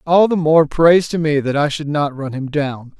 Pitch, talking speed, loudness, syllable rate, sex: 150 Hz, 260 wpm, -16 LUFS, 4.9 syllables/s, male